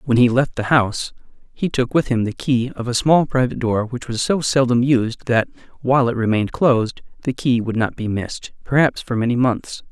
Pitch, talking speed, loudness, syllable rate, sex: 125 Hz, 220 wpm, -19 LUFS, 5.4 syllables/s, male